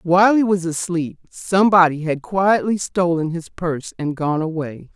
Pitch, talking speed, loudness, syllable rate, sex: 175 Hz, 155 wpm, -19 LUFS, 4.7 syllables/s, female